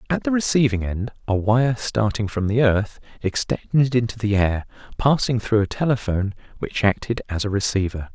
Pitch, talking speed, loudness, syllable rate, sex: 110 Hz, 170 wpm, -21 LUFS, 5.2 syllables/s, male